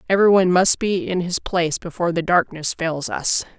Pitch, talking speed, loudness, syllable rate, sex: 175 Hz, 200 wpm, -19 LUFS, 5.8 syllables/s, female